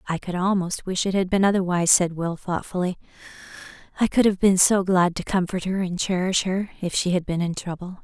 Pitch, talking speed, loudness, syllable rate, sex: 185 Hz, 215 wpm, -22 LUFS, 5.6 syllables/s, female